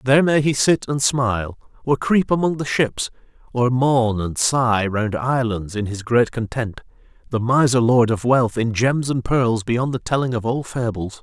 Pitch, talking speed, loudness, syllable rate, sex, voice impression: 120 Hz, 185 wpm, -19 LUFS, 4.4 syllables/s, male, very masculine, very adult-like, very middle-aged, thick, slightly tensed, powerful, slightly bright, hard, slightly muffled, fluent, cool, very intellectual, slightly refreshing, sincere, calm, very mature, friendly, reassuring, unique, slightly elegant, very wild, slightly sweet, lively, kind, slightly modest